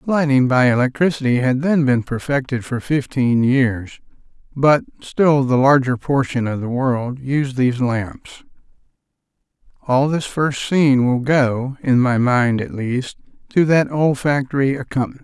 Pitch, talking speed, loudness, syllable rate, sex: 130 Hz, 140 wpm, -18 LUFS, 4.3 syllables/s, male